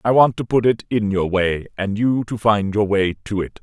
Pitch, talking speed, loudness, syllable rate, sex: 105 Hz, 265 wpm, -19 LUFS, 4.9 syllables/s, male